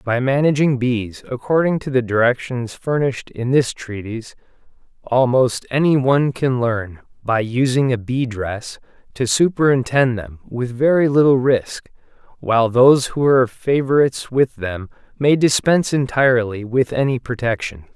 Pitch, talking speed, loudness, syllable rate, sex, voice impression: 125 Hz, 135 wpm, -18 LUFS, 4.8 syllables/s, male, masculine, adult-like, slightly halting, refreshing, slightly sincere